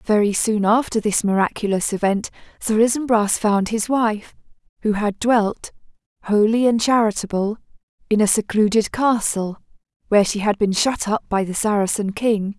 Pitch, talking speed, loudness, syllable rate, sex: 215 Hz, 150 wpm, -19 LUFS, 4.9 syllables/s, female